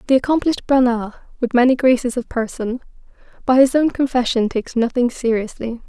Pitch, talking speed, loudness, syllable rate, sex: 245 Hz, 155 wpm, -18 LUFS, 5.9 syllables/s, female